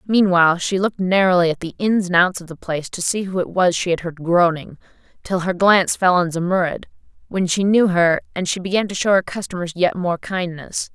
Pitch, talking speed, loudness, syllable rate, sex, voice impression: 180 Hz, 225 wpm, -18 LUFS, 5.7 syllables/s, female, very feminine, very adult-like, slightly middle-aged, thin, slightly tensed, powerful, slightly dark, hard, very clear, fluent, slightly raspy, slightly cute, cool, intellectual, refreshing, sincere, slightly calm, slightly friendly, reassuring, unique, slightly elegant, slightly sweet, slightly lively, strict, slightly intense, slightly sharp